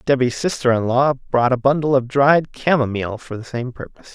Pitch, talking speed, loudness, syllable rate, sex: 130 Hz, 205 wpm, -18 LUFS, 5.4 syllables/s, male